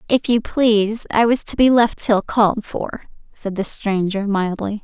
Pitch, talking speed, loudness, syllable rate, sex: 215 Hz, 185 wpm, -18 LUFS, 4.4 syllables/s, female